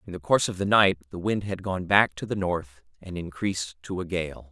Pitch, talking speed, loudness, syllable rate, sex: 90 Hz, 255 wpm, -26 LUFS, 5.5 syllables/s, male